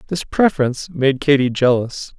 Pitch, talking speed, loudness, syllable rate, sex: 140 Hz, 140 wpm, -17 LUFS, 5.2 syllables/s, male